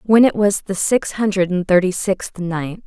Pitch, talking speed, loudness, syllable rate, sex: 190 Hz, 210 wpm, -18 LUFS, 4.4 syllables/s, female